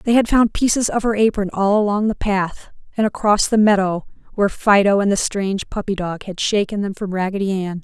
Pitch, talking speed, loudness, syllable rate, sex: 205 Hz, 215 wpm, -18 LUFS, 5.5 syllables/s, female